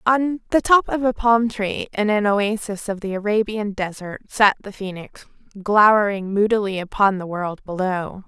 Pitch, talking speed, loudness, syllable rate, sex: 205 Hz, 165 wpm, -20 LUFS, 4.5 syllables/s, female